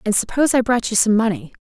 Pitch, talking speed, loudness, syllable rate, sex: 220 Hz, 255 wpm, -17 LUFS, 6.9 syllables/s, female